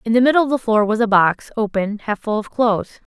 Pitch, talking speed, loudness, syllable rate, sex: 220 Hz, 265 wpm, -18 LUFS, 5.9 syllables/s, female